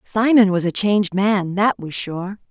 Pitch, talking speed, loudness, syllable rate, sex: 200 Hz, 190 wpm, -18 LUFS, 4.3 syllables/s, female